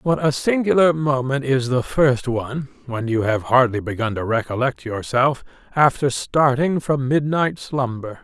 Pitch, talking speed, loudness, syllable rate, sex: 135 Hz, 155 wpm, -20 LUFS, 4.4 syllables/s, male